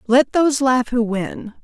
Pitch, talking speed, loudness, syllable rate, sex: 250 Hz, 185 wpm, -18 LUFS, 4.2 syllables/s, female